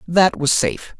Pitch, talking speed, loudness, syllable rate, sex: 155 Hz, 180 wpm, -17 LUFS, 4.8 syllables/s, male